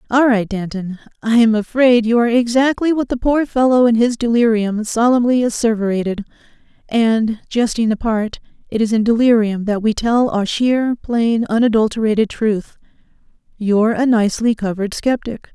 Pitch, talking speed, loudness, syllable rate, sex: 230 Hz, 145 wpm, -16 LUFS, 5.1 syllables/s, female